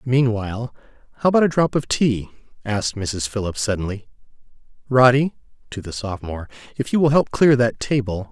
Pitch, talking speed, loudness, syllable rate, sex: 115 Hz, 145 wpm, -20 LUFS, 5.7 syllables/s, male